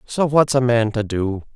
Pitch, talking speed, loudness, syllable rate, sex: 120 Hz, 230 wpm, -18 LUFS, 4.5 syllables/s, male